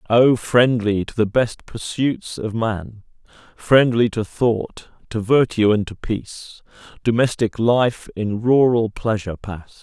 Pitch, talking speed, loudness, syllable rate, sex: 115 Hz, 135 wpm, -19 LUFS, 3.8 syllables/s, male